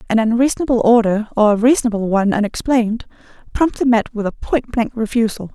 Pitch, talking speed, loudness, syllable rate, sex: 225 Hz, 160 wpm, -16 LUFS, 6.2 syllables/s, female